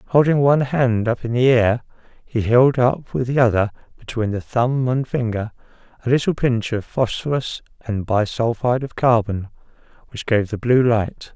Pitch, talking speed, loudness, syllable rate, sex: 120 Hz, 175 wpm, -19 LUFS, 4.7 syllables/s, male